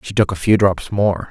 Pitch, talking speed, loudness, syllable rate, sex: 100 Hz, 275 wpm, -17 LUFS, 5.0 syllables/s, male